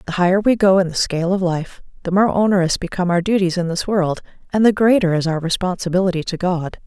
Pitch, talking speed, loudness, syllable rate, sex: 185 Hz, 225 wpm, -18 LUFS, 6.3 syllables/s, female